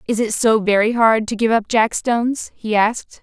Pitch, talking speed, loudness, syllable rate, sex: 220 Hz, 225 wpm, -17 LUFS, 4.9 syllables/s, female